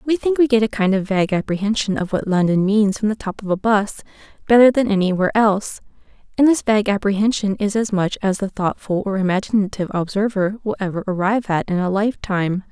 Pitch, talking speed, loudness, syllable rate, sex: 205 Hz, 205 wpm, -19 LUFS, 6.3 syllables/s, female